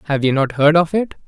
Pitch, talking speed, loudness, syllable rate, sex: 155 Hz, 285 wpm, -16 LUFS, 6.1 syllables/s, male